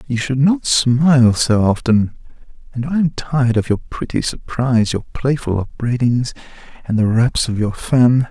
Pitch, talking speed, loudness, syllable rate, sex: 125 Hz, 165 wpm, -17 LUFS, 4.6 syllables/s, male